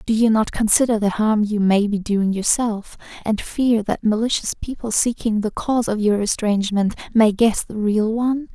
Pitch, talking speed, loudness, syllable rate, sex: 215 Hz, 190 wpm, -19 LUFS, 4.9 syllables/s, female